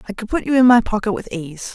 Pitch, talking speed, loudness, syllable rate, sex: 220 Hz, 310 wpm, -17 LUFS, 6.6 syllables/s, female